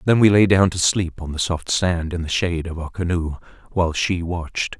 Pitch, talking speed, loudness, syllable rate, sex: 90 Hz, 240 wpm, -20 LUFS, 5.3 syllables/s, male